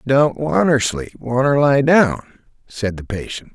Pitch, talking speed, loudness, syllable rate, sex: 130 Hz, 150 wpm, -17 LUFS, 4.0 syllables/s, male